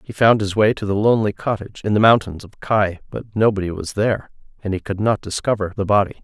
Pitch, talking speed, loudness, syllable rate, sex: 100 Hz, 230 wpm, -19 LUFS, 6.3 syllables/s, male